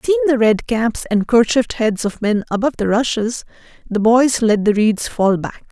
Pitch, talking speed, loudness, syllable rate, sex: 230 Hz, 200 wpm, -16 LUFS, 5.1 syllables/s, female